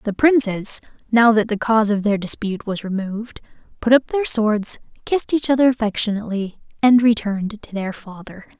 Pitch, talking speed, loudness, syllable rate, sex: 220 Hz, 170 wpm, -19 LUFS, 5.5 syllables/s, female